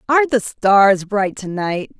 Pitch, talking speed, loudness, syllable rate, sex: 210 Hz, 150 wpm, -16 LUFS, 4.0 syllables/s, female